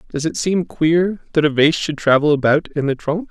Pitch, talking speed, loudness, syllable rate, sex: 155 Hz, 235 wpm, -17 LUFS, 5.0 syllables/s, male